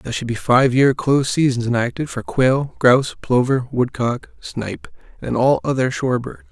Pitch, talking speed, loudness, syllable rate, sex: 130 Hz, 175 wpm, -18 LUFS, 5.1 syllables/s, male